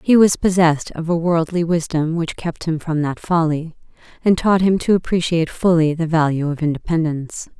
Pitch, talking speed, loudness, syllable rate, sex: 165 Hz, 180 wpm, -18 LUFS, 5.3 syllables/s, female